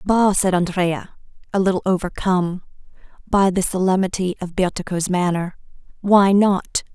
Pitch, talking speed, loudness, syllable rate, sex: 185 Hz, 120 wpm, -19 LUFS, 4.7 syllables/s, female